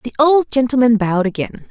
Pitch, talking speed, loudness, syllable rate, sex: 245 Hz, 175 wpm, -15 LUFS, 5.6 syllables/s, female